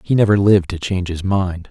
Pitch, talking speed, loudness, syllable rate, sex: 95 Hz, 245 wpm, -17 LUFS, 6.2 syllables/s, male